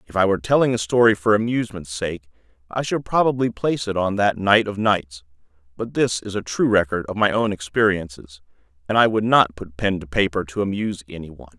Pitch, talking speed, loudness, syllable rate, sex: 100 Hz, 205 wpm, -20 LUFS, 5.9 syllables/s, male